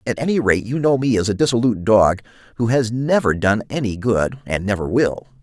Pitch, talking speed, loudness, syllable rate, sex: 115 Hz, 210 wpm, -18 LUFS, 5.5 syllables/s, male